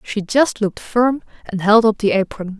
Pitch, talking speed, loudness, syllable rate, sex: 215 Hz, 210 wpm, -17 LUFS, 4.8 syllables/s, female